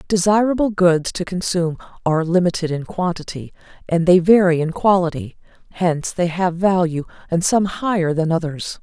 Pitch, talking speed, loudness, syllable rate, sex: 175 Hz, 150 wpm, -18 LUFS, 5.2 syllables/s, female